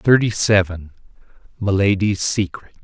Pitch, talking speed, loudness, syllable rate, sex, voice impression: 100 Hz, 85 wpm, -18 LUFS, 4.4 syllables/s, male, masculine, adult-like, thick, tensed, slightly bright, cool, intellectual, sincere, slightly mature, slightly friendly, wild